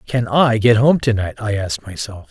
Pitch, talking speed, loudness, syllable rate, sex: 115 Hz, 210 wpm, -17 LUFS, 5.1 syllables/s, male